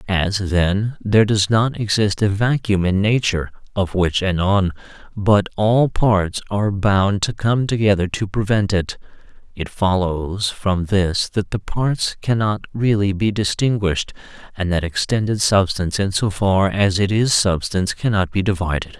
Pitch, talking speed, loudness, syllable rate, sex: 100 Hz, 155 wpm, -19 LUFS, 4.3 syllables/s, male